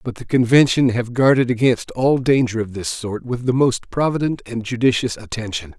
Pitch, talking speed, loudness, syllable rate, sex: 120 Hz, 185 wpm, -18 LUFS, 5.1 syllables/s, male